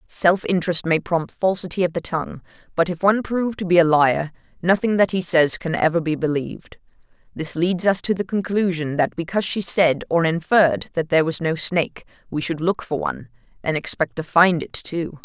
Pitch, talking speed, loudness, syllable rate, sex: 170 Hz, 200 wpm, -21 LUFS, 5.5 syllables/s, female